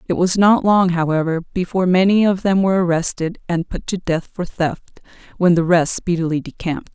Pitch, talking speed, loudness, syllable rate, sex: 175 Hz, 190 wpm, -18 LUFS, 5.7 syllables/s, female